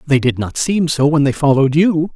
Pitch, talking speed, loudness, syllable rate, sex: 145 Hz, 250 wpm, -15 LUFS, 5.4 syllables/s, male